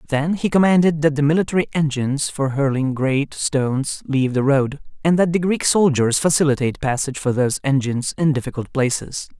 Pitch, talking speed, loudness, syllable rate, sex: 145 Hz, 170 wpm, -19 LUFS, 5.7 syllables/s, male